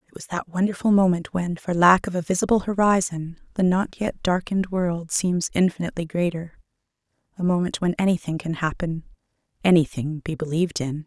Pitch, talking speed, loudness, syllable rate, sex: 175 Hz, 155 wpm, -23 LUFS, 5.8 syllables/s, female